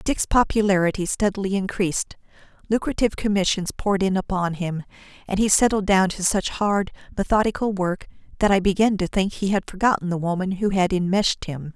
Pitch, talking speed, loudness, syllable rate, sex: 195 Hz, 170 wpm, -22 LUFS, 5.7 syllables/s, female